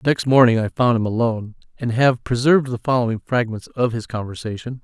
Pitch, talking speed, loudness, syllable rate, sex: 120 Hz, 185 wpm, -19 LUFS, 5.8 syllables/s, male